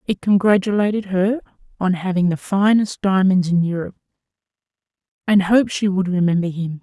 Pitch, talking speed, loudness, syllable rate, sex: 190 Hz, 140 wpm, -18 LUFS, 5.6 syllables/s, female